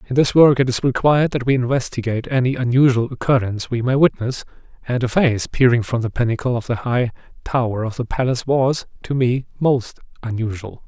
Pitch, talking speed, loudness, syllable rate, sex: 125 Hz, 190 wpm, -19 LUFS, 5.9 syllables/s, male